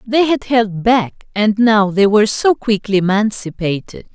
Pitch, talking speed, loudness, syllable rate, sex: 215 Hz, 160 wpm, -15 LUFS, 4.4 syllables/s, female